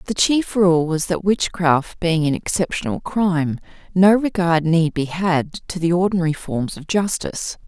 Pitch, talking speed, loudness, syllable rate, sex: 170 Hz, 165 wpm, -19 LUFS, 4.4 syllables/s, female